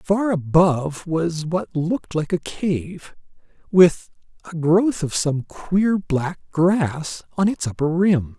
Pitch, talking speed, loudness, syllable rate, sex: 165 Hz, 145 wpm, -20 LUFS, 3.3 syllables/s, male